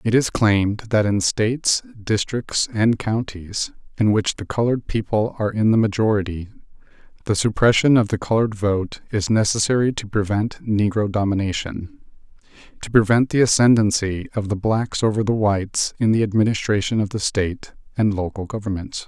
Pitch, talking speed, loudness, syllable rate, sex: 105 Hz, 150 wpm, -20 LUFS, 5.2 syllables/s, male